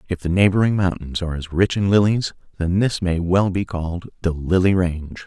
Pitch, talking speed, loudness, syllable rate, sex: 90 Hz, 205 wpm, -20 LUFS, 5.3 syllables/s, male